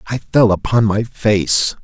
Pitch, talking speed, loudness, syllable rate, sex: 105 Hz, 165 wpm, -15 LUFS, 3.6 syllables/s, male